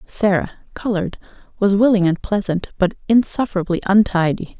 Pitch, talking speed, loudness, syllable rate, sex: 195 Hz, 120 wpm, -18 LUFS, 5.5 syllables/s, female